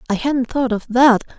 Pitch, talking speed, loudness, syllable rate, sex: 245 Hz, 215 wpm, -17 LUFS, 5.0 syllables/s, female